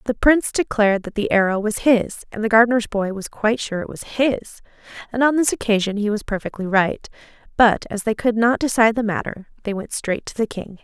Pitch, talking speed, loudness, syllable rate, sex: 220 Hz, 215 wpm, -20 LUFS, 5.9 syllables/s, female